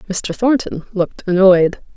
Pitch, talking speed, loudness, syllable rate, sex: 190 Hz, 120 wpm, -16 LUFS, 4.5 syllables/s, female